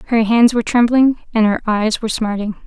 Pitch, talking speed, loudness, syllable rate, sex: 225 Hz, 205 wpm, -15 LUFS, 6.0 syllables/s, female